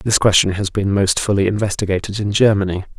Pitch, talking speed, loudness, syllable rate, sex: 100 Hz, 180 wpm, -17 LUFS, 6.0 syllables/s, male